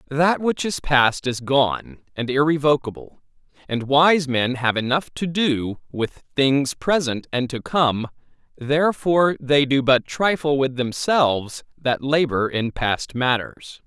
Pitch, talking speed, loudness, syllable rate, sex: 140 Hz, 145 wpm, -20 LUFS, 3.9 syllables/s, male